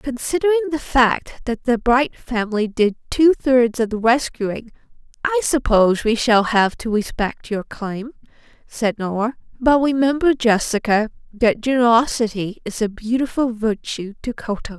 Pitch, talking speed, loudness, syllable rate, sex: 235 Hz, 140 wpm, -19 LUFS, 4.6 syllables/s, female